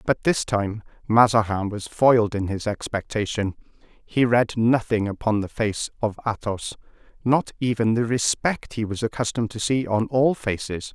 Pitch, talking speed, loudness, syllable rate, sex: 110 Hz, 160 wpm, -23 LUFS, 4.7 syllables/s, male